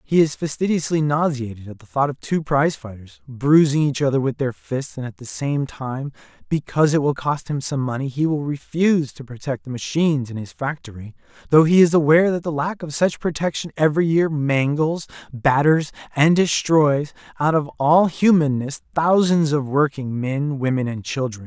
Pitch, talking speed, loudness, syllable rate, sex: 145 Hz, 185 wpm, -20 LUFS, 5.1 syllables/s, male